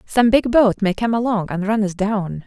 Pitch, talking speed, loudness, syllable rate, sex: 210 Hz, 245 wpm, -18 LUFS, 4.8 syllables/s, female